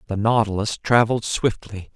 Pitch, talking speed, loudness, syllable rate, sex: 110 Hz, 125 wpm, -20 LUFS, 5.2 syllables/s, male